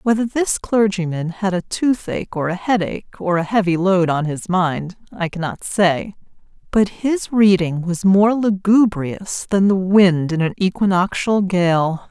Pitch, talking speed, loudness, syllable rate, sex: 190 Hz, 160 wpm, -18 LUFS, 4.2 syllables/s, female